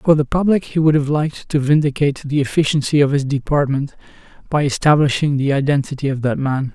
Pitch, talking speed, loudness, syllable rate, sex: 145 Hz, 185 wpm, -17 LUFS, 6.3 syllables/s, male